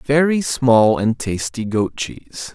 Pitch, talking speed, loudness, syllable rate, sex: 120 Hz, 140 wpm, -18 LUFS, 3.7 syllables/s, male